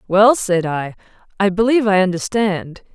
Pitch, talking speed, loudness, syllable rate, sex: 195 Hz, 145 wpm, -17 LUFS, 4.9 syllables/s, female